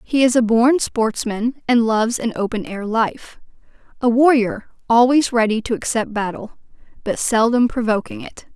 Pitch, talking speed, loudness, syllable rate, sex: 230 Hz, 145 wpm, -18 LUFS, 4.6 syllables/s, female